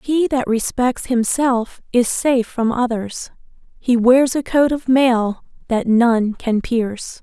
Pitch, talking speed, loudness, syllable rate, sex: 245 Hz, 150 wpm, -17 LUFS, 3.7 syllables/s, female